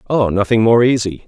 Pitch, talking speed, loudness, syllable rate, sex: 110 Hz, 190 wpm, -14 LUFS, 5.6 syllables/s, male